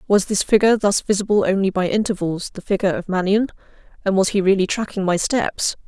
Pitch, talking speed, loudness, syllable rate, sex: 195 Hz, 195 wpm, -19 LUFS, 6.2 syllables/s, female